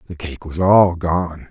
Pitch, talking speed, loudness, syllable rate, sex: 85 Hz, 200 wpm, -16 LUFS, 3.8 syllables/s, male